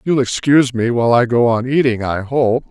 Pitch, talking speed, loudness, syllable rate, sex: 125 Hz, 220 wpm, -15 LUFS, 5.5 syllables/s, male